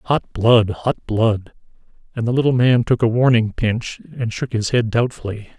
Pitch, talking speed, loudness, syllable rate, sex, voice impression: 115 Hz, 185 wpm, -18 LUFS, 4.8 syllables/s, male, masculine, adult-like, tensed, powerful, hard, clear, fluent, intellectual, calm, mature, reassuring, wild, lively, slightly kind